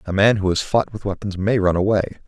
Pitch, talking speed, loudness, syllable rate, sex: 100 Hz, 265 wpm, -20 LUFS, 5.8 syllables/s, male